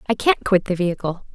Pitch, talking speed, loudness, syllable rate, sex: 190 Hz, 225 wpm, -20 LUFS, 6.3 syllables/s, female